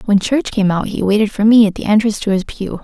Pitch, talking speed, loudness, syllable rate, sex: 210 Hz, 295 wpm, -15 LUFS, 6.3 syllables/s, female